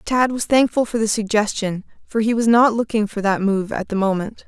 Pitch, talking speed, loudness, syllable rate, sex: 215 Hz, 230 wpm, -19 LUFS, 5.3 syllables/s, female